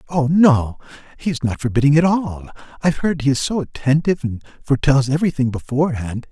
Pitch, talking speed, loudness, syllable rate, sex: 140 Hz, 170 wpm, -18 LUFS, 6.1 syllables/s, male